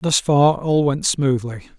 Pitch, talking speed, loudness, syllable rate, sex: 140 Hz, 170 wpm, -18 LUFS, 3.6 syllables/s, male